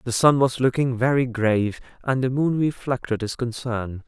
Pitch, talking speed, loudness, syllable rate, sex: 125 Hz, 175 wpm, -22 LUFS, 4.8 syllables/s, male